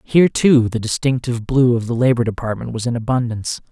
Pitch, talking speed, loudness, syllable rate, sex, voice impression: 120 Hz, 195 wpm, -18 LUFS, 6.2 syllables/s, male, slightly masculine, slightly adult-like, slightly clear, refreshing, slightly sincere, slightly friendly